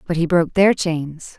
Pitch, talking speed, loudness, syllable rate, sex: 165 Hz, 215 wpm, -18 LUFS, 4.9 syllables/s, female